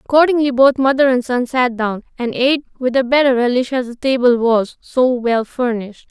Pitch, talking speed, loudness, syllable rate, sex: 250 Hz, 195 wpm, -16 LUFS, 5.4 syllables/s, female